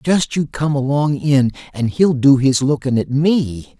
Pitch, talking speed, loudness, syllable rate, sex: 140 Hz, 190 wpm, -16 LUFS, 4.0 syllables/s, male